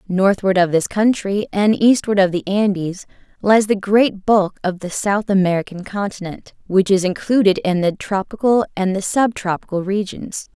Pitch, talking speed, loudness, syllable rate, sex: 195 Hz, 160 wpm, -18 LUFS, 4.7 syllables/s, female